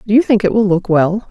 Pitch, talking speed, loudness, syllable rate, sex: 205 Hz, 320 wpm, -13 LUFS, 6.0 syllables/s, female